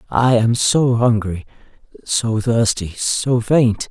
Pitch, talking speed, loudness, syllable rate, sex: 115 Hz, 125 wpm, -17 LUFS, 3.3 syllables/s, male